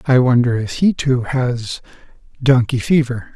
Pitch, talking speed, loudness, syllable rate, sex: 125 Hz, 145 wpm, -16 LUFS, 4.2 syllables/s, male